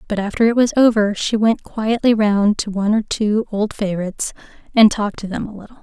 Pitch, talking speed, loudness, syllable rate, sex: 210 Hz, 215 wpm, -17 LUFS, 5.8 syllables/s, female